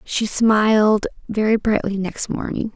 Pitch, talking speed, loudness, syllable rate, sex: 215 Hz, 130 wpm, -19 LUFS, 4.1 syllables/s, female